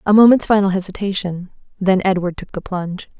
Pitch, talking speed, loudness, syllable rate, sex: 190 Hz, 170 wpm, -17 LUFS, 5.9 syllables/s, female